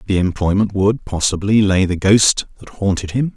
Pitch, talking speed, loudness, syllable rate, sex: 100 Hz, 180 wpm, -16 LUFS, 4.9 syllables/s, male